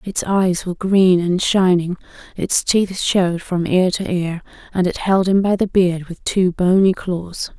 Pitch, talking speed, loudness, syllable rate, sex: 185 Hz, 190 wpm, -17 LUFS, 4.1 syllables/s, female